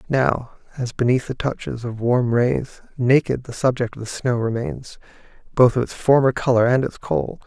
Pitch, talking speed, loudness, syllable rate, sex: 125 Hz, 185 wpm, -20 LUFS, 4.8 syllables/s, male